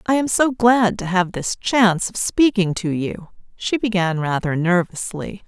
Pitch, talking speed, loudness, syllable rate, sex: 195 Hz, 175 wpm, -19 LUFS, 4.4 syllables/s, female